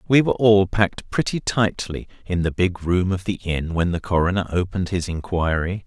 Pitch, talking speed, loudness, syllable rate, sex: 95 Hz, 195 wpm, -21 LUFS, 5.3 syllables/s, male